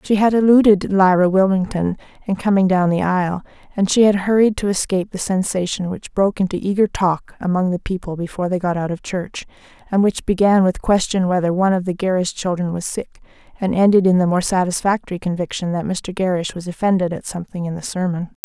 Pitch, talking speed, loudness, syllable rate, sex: 185 Hz, 200 wpm, -18 LUFS, 6.0 syllables/s, female